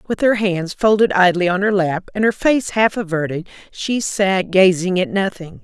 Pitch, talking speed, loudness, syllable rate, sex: 190 Hz, 190 wpm, -17 LUFS, 4.6 syllables/s, female